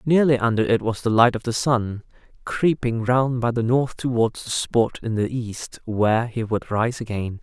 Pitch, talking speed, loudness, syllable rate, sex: 115 Hz, 200 wpm, -22 LUFS, 4.5 syllables/s, male